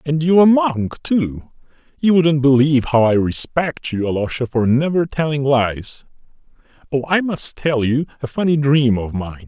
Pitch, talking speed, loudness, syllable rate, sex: 140 Hz, 170 wpm, -17 LUFS, 4.5 syllables/s, male